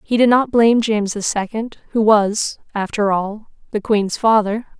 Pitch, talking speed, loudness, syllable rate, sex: 215 Hz, 175 wpm, -17 LUFS, 4.7 syllables/s, female